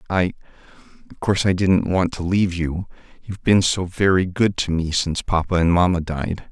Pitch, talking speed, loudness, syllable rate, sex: 90 Hz, 175 wpm, -20 LUFS, 5.1 syllables/s, male